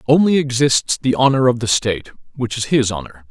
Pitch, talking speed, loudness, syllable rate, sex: 125 Hz, 200 wpm, -17 LUFS, 5.6 syllables/s, male